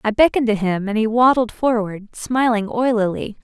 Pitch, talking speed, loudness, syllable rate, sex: 225 Hz, 175 wpm, -18 LUFS, 5.2 syllables/s, female